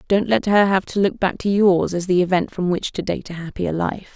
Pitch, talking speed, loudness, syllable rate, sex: 190 Hz, 275 wpm, -19 LUFS, 5.3 syllables/s, female